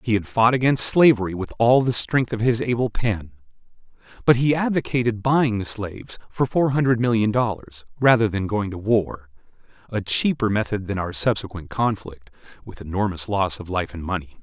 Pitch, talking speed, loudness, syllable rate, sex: 110 Hz, 175 wpm, -21 LUFS, 5.2 syllables/s, male